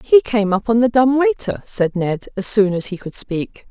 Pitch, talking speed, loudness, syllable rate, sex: 220 Hz, 245 wpm, -18 LUFS, 4.7 syllables/s, female